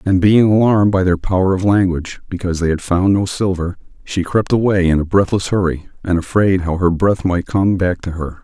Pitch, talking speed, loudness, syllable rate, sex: 95 Hz, 220 wpm, -16 LUFS, 4.8 syllables/s, male